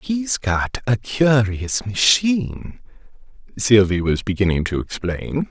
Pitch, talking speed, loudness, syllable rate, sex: 115 Hz, 110 wpm, -19 LUFS, 3.7 syllables/s, male